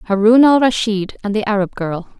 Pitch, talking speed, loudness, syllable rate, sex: 215 Hz, 190 wpm, -15 LUFS, 5.0 syllables/s, female